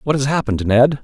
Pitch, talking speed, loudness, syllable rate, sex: 125 Hz, 230 wpm, -17 LUFS, 6.5 syllables/s, male